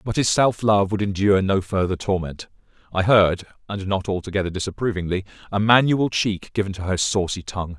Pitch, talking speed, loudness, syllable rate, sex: 100 Hz, 175 wpm, -21 LUFS, 5.6 syllables/s, male